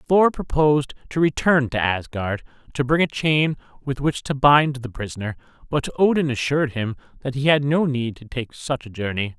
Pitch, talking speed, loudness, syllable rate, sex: 135 Hz, 190 wpm, -21 LUFS, 5.1 syllables/s, male